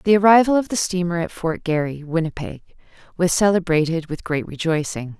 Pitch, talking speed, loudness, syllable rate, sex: 170 Hz, 160 wpm, -20 LUFS, 5.5 syllables/s, female